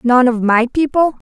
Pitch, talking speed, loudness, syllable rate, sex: 255 Hz, 180 wpm, -14 LUFS, 4.4 syllables/s, female